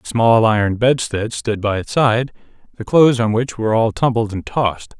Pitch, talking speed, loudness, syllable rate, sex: 115 Hz, 205 wpm, -17 LUFS, 5.2 syllables/s, male